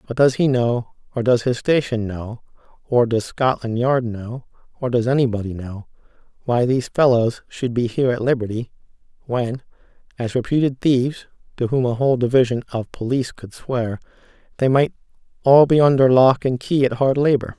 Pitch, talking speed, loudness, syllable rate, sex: 125 Hz, 170 wpm, -19 LUFS, 5.3 syllables/s, male